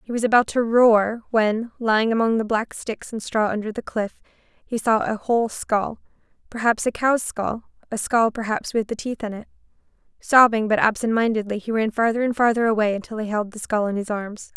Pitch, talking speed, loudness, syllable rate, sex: 220 Hz, 205 wpm, -21 LUFS, 5.2 syllables/s, female